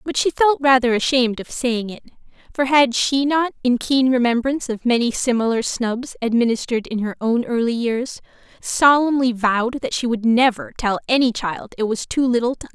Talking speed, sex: 190 wpm, female